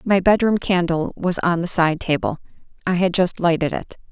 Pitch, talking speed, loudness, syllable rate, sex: 175 Hz, 190 wpm, -20 LUFS, 5.0 syllables/s, female